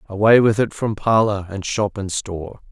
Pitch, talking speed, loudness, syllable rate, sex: 105 Hz, 200 wpm, -18 LUFS, 4.8 syllables/s, male